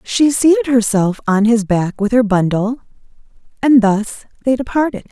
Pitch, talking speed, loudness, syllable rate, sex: 230 Hz, 150 wpm, -15 LUFS, 4.5 syllables/s, female